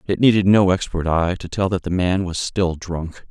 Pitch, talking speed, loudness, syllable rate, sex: 90 Hz, 235 wpm, -19 LUFS, 4.8 syllables/s, male